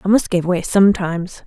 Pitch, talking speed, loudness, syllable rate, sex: 185 Hz, 205 wpm, -17 LUFS, 5.8 syllables/s, female